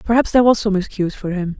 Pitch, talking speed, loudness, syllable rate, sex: 205 Hz, 265 wpm, -17 LUFS, 7.4 syllables/s, female